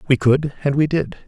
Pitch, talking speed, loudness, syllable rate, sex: 145 Hz, 235 wpm, -19 LUFS, 5.4 syllables/s, male